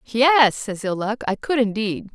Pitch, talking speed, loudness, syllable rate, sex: 225 Hz, 195 wpm, -20 LUFS, 4.1 syllables/s, female